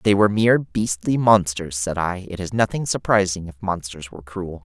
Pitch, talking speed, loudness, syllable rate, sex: 95 Hz, 190 wpm, -21 LUFS, 5.3 syllables/s, male